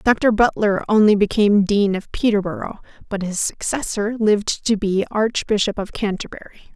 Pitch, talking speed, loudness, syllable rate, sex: 205 Hz, 140 wpm, -19 LUFS, 5.1 syllables/s, female